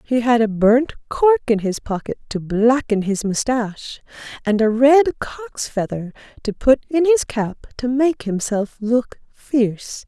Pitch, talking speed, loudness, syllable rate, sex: 235 Hz, 160 wpm, -19 LUFS, 4.0 syllables/s, female